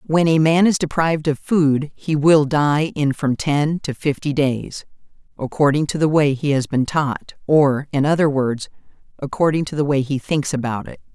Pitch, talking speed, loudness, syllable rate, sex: 145 Hz, 195 wpm, -18 LUFS, 4.6 syllables/s, female